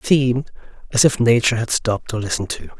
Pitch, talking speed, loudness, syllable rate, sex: 120 Hz, 215 wpm, -19 LUFS, 6.4 syllables/s, male